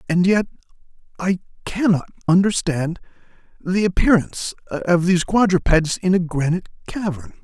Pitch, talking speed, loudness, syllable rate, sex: 180 Hz, 115 wpm, -19 LUFS, 5.2 syllables/s, male